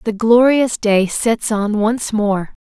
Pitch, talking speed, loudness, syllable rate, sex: 220 Hz, 155 wpm, -16 LUFS, 3.3 syllables/s, female